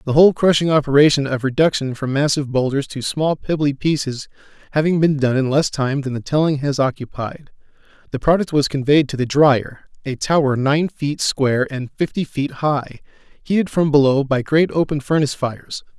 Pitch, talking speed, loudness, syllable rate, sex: 140 Hz, 180 wpm, -18 LUFS, 5.4 syllables/s, male